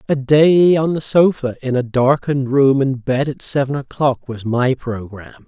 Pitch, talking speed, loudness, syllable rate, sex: 135 Hz, 185 wpm, -16 LUFS, 4.7 syllables/s, male